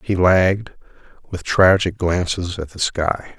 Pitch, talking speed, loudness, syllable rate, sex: 90 Hz, 140 wpm, -18 LUFS, 4.3 syllables/s, male